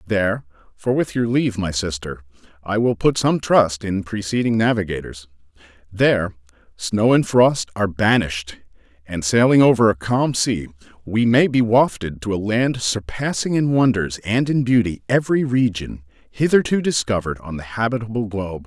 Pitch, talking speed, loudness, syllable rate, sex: 105 Hz, 150 wpm, -19 LUFS, 5.1 syllables/s, male